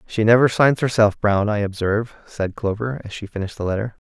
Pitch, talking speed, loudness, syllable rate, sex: 110 Hz, 205 wpm, -20 LUFS, 6.2 syllables/s, male